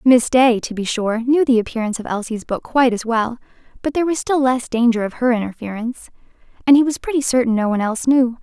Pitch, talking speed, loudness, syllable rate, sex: 245 Hz, 230 wpm, -18 LUFS, 6.5 syllables/s, female